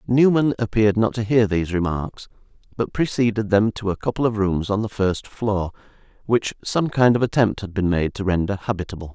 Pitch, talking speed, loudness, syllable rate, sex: 105 Hz, 195 wpm, -21 LUFS, 5.5 syllables/s, male